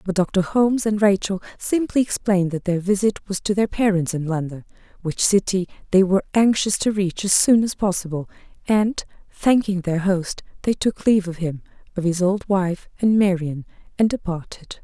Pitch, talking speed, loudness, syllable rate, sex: 195 Hz, 180 wpm, -21 LUFS, 5.1 syllables/s, female